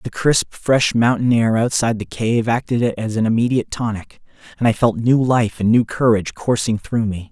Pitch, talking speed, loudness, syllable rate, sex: 115 Hz, 195 wpm, -18 LUFS, 5.1 syllables/s, male